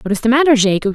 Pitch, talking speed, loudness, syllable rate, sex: 230 Hz, 320 wpm, -13 LUFS, 8.2 syllables/s, female